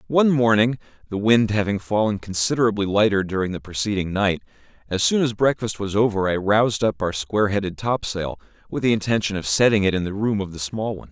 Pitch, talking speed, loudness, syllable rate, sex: 105 Hz, 205 wpm, -21 LUFS, 6.1 syllables/s, male